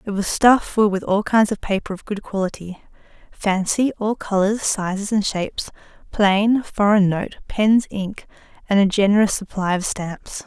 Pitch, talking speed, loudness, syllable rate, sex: 200 Hz, 160 wpm, -20 LUFS, 4.6 syllables/s, female